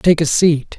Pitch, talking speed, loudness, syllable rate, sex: 160 Hz, 230 wpm, -14 LUFS, 4.0 syllables/s, male